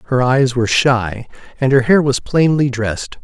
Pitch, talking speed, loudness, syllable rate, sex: 130 Hz, 185 wpm, -15 LUFS, 4.5 syllables/s, male